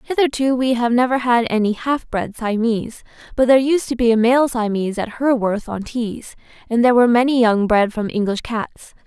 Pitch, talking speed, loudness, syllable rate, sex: 235 Hz, 200 wpm, -18 LUFS, 5.3 syllables/s, female